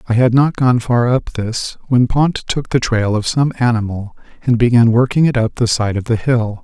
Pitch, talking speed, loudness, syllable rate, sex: 120 Hz, 225 wpm, -15 LUFS, 4.8 syllables/s, male